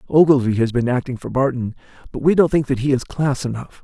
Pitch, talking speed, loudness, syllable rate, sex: 130 Hz, 235 wpm, -19 LUFS, 6.1 syllables/s, male